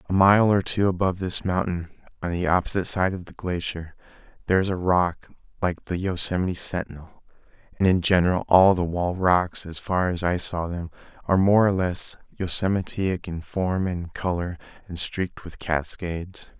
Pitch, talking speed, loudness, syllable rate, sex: 90 Hz, 175 wpm, -24 LUFS, 5.1 syllables/s, male